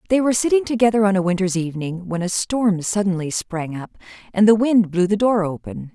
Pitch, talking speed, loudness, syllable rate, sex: 195 Hz, 210 wpm, -19 LUFS, 5.9 syllables/s, female